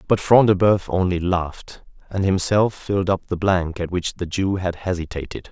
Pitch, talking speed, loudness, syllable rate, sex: 95 Hz, 195 wpm, -20 LUFS, 4.9 syllables/s, male